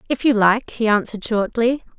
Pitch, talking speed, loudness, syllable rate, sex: 225 Hz, 180 wpm, -19 LUFS, 5.5 syllables/s, female